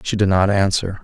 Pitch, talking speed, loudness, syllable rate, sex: 100 Hz, 230 wpm, -17 LUFS, 5.4 syllables/s, male